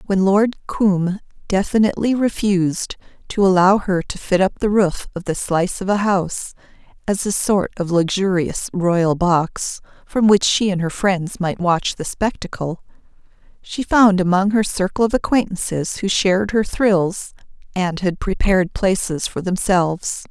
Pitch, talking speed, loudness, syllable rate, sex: 190 Hz, 155 wpm, -18 LUFS, 4.4 syllables/s, female